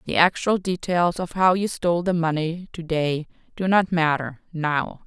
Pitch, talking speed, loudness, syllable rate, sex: 170 Hz, 165 wpm, -22 LUFS, 4.5 syllables/s, female